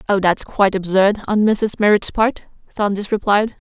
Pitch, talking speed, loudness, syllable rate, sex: 205 Hz, 165 wpm, -17 LUFS, 5.0 syllables/s, female